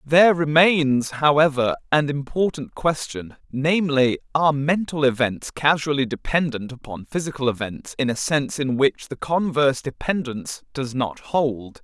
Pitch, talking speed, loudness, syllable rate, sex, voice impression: 140 Hz, 130 wpm, -21 LUFS, 4.7 syllables/s, male, masculine, adult-like, refreshing, sincere, friendly